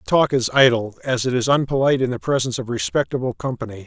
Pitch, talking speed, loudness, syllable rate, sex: 125 Hz, 220 wpm, -20 LUFS, 7.9 syllables/s, male